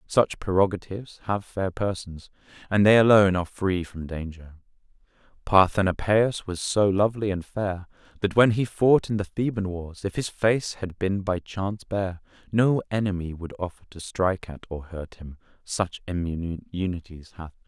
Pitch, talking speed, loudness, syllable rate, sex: 95 Hz, 165 wpm, -25 LUFS, 5.0 syllables/s, male